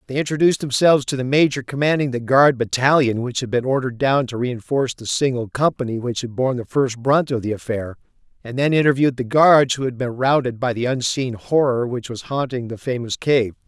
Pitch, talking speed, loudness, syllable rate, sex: 130 Hz, 210 wpm, -19 LUFS, 5.8 syllables/s, male